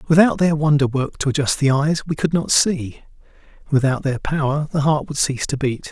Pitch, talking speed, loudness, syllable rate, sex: 145 Hz, 215 wpm, -19 LUFS, 5.5 syllables/s, male